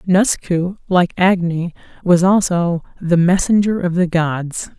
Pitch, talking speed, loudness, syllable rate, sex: 180 Hz, 125 wpm, -16 LUFS, 3.7 syllables/s, female